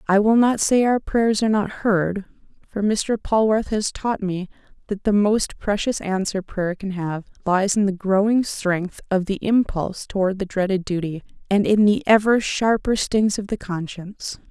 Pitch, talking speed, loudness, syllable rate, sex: 200 Hz, 180 wpm, -21 LUFS, 4.6 syllables/s, female